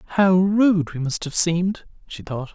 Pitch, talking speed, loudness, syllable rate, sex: 175 Hz, 190 wpm, -20 LUFS, 4.0 syllables/s, male